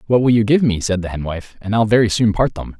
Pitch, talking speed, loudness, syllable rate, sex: 105 Hz, 320 wpm, -17 LUFS, 6.2 syllables/s, male